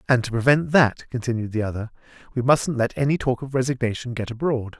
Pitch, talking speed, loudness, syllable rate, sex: 125 Hz, 200 wpm, -22 LUFS, 6.0 syllables/s, male